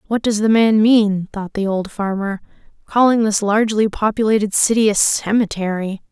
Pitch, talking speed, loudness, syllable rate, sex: 210 Hz, 155 wpm, -17 LUFS, 5.0 syllables/s, female